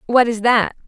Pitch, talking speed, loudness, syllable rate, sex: 230 Hz, 205 wpm, -16 LUFS, 4.7 syllables/s, female